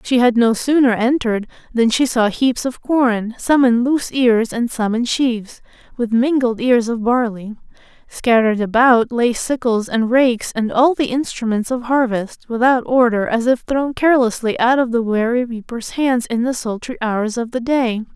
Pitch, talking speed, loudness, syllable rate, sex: 240 Hz, 180 wpm, -17 LUFS, 4.7 syllables/s, female